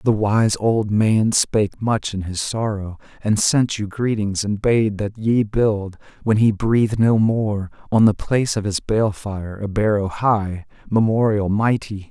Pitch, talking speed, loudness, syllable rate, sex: 105 Hz, 170 wpm, -19 LUFS, 4.2 syllables/s, male